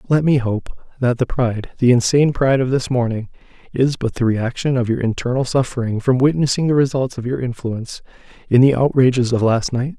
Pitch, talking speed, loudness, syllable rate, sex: 125 Hz, 200 wpm, -18 LUFS, 5.7 syllables/s, male